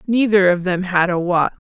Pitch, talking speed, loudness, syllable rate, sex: 185 Hz, 215 wpm, -17 LUFS, 4.8 syllables/s, female